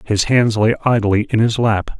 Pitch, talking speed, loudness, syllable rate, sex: 110 Hz, 210 wpm, -16 LUFS, 4.7 syllables/s, male